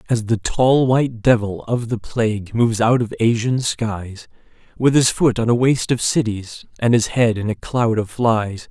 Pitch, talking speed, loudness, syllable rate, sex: 115 Hz, 200 wpm, -18 LUFS, 4.6 syllables/s, male